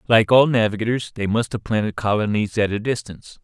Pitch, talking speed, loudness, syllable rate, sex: 110 Hz, 190 wpm, -20 LUFS, 5.9 syllables/s, male